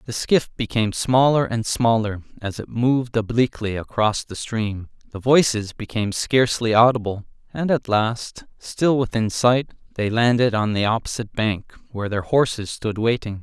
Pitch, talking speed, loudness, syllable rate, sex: 115 Hz, 155 wpm, -21 LUFS, 4.9 syllables/s, male